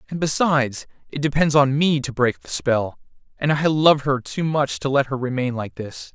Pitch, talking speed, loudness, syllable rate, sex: 140 Hz, 215 wpm, -20 LUFS, 4.9 syllables/s, male